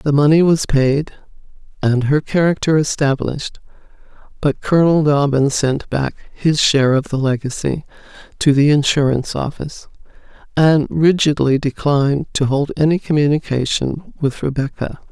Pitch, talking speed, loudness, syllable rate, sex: 145 Hz, 125 wpm, -16 LUFS, 4.9 syllables/s, female